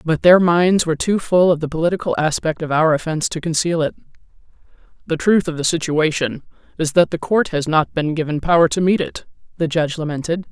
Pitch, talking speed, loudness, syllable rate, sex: 165 Hz, 205 wpm, -18 LUFS, 5.9 syllables/s, female